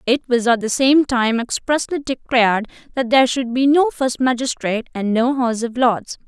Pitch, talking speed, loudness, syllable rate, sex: 250 Hz, 190 wpm, -18 LUFS, 5.1 syllables/s, female